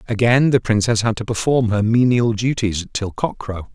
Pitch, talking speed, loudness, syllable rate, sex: 115 Hz, 190 wpm, -18 LUFS, 4.8 syllables/s, male